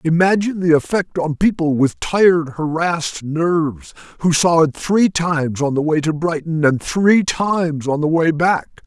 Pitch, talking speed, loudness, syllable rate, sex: 165 Hz, 175 wpm, -17 LUFS, 4.5 syllables/s, male